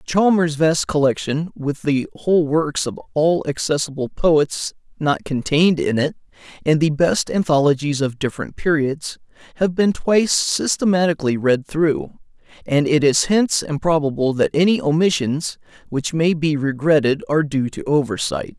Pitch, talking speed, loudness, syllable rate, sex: 155 Hz, 140 wpm, -19 LUFS, 4.7 syllables/s, male